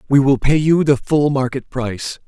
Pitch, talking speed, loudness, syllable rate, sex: 135 Hz, 210 wpm, -17 LUFS, 4.9 syllables/s, male